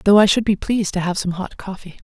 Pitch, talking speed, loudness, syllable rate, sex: 195 Hz, 290 wpm, -19 LUFS, 6.4 syllables/s, female